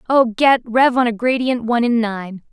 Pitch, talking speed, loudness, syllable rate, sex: 235 Hz, 215 wpm, -16 LUFS, 4.9 syllables/s, female